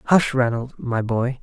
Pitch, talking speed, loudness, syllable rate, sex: 125 Hz, 170 wpm, -21 LUFS, 4.3 syllables/s, male